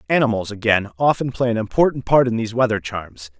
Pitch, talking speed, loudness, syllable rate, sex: 115 Hz, 195 wpm, -19 LUFS, 6.1 syllables/s, male